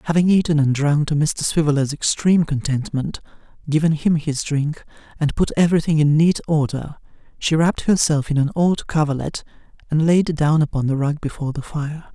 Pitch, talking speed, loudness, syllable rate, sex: 155 Hz, 175 wpm, -19 LUFS, 5.5 syllables/s, male